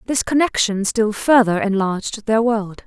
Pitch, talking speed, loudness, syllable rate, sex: 220 Hz, 145 wpm, -18 LUFS, 4.5 syllables/s, female